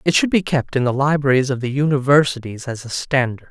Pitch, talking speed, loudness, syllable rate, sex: 135 Hz, 225 wpm, -18 LUFS, 5.9 syllables/s, male